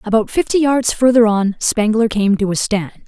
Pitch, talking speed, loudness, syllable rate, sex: 220 Hz, 195 wpm, -15 LUFS, 5.0 syllables/s, female